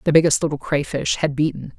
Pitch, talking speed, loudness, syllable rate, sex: 140 Hz, 200 wpm, -20 LUFS, 6.1 syllables/s, female